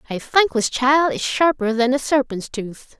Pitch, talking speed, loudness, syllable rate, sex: 260 Hz, 180 wpm, -19 LUFS, 4.3 syllables/s, female